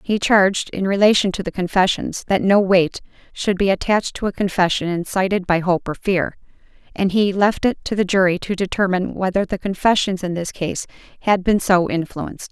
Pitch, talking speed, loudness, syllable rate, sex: 190 Hz, 190 wpm, -19 LUFS, 5.4 syllables/s, female